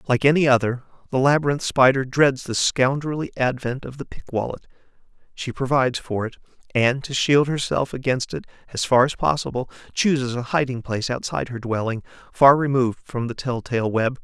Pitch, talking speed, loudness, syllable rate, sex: 130 Hz, 175 wpm, -21 LUFS, 5.5 syllables/s, male